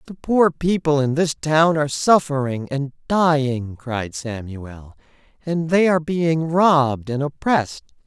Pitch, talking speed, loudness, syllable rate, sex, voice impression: 145 Hz, 140 wpm, -19 LUFS, 4.1 syllables/s, male, very masculine, slightly young, slightly adult-like, slightly thick, very tensed, powerful, slightly bright, soft, very clear, fluent, cool, intellectual, very refreshing, sincere, calm, very friendly, very reassuring, slightly unique, elegant, slightly wild, very sweet, slightly lively, very kind, slightly modest